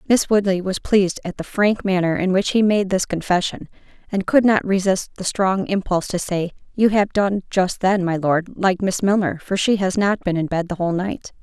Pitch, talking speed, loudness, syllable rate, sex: 190 Hz, 225 wpm, -20 LUFS, 5.1 syllables/s, female